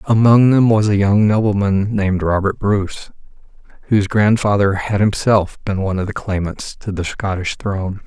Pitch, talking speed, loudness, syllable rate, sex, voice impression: 100 Hz, 165 wpm, -16 LUFS, 5.1 syllables/s, male, masculine, adult-like, thick, slightly relaxed, soft, slightly muffled, cool, calm, mature, wild, kind, modest